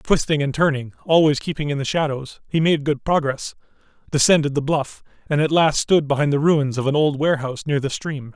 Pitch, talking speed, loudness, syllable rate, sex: 145 Hz, 210 wpm, -20 LUFS, 5.7 syllables/s, male